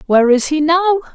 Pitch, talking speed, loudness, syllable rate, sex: 310 Hz, 210 wpm, -14 LUFS, 7.9 syllables/s, female